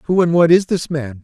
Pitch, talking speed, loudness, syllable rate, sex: 160 Hz, 290 wpm, -15 LUFS, 5.7 syllables/s, male